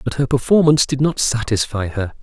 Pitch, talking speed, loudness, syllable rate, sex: 125 Hz, 190 wpm, -17 LUFS, 5.8 syllables/s, male